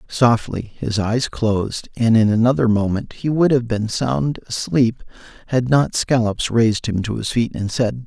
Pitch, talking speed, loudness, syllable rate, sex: 115 Hz, 180 wpm, -19 LUFS, 4.4 syllables/s, male